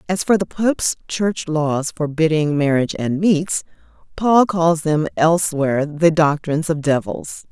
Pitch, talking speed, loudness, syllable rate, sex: 160 Hz, 145 wpm, -18 LUFS, 4.4 syllables/s, female